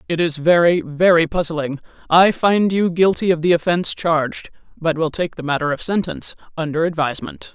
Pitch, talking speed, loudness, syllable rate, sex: 165 Hz, 175 wpm, -18 LUFS, 5.5 syllables/s, female